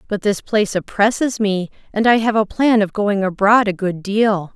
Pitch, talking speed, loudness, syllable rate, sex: 205 Hz, 210 wpm, -17 LUFS, 4.8 syllables/s, female